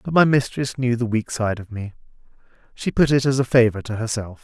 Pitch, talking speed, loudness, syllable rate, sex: 120 Hz, 230 wpm, -20 LUFS, 5.7 syllables/s, male